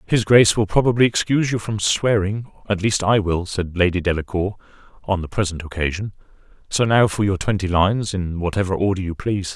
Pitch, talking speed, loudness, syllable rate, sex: 100 Hz, 190 wpm, -20 LUFS, 5.8 syllables/s, male